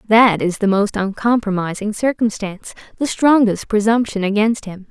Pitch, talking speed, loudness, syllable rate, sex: 210 Hz, 135 wpm, -17 LUFS, 4.7 syllables/s, female